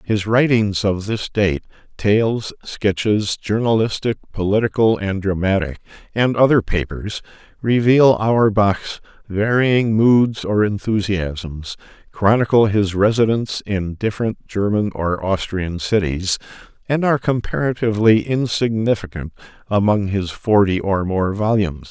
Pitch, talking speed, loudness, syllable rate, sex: 105 Hz, 100 wpm, -18 LUFS, 4.3 syllables/s, male